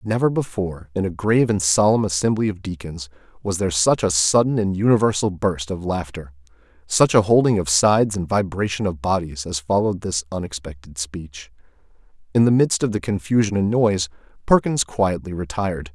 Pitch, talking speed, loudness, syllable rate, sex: 95 Hz, 170 wpm, -20 LUFS, 5.5 syllables/s, male